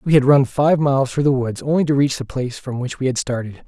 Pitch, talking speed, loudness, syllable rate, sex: 135 Hz, 295 wpm, -18 LUFS, 6.3 syllables/s, male